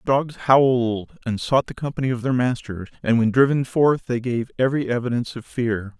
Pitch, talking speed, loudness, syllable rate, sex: 125 Hz, 190 wpm, -21 LUFS, 5.3 syllables/s, male